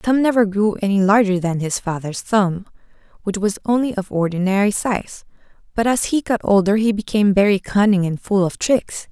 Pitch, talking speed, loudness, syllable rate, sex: 205 Hz, 185 wpm, -18 LUFS, 5.2 syllables/s, female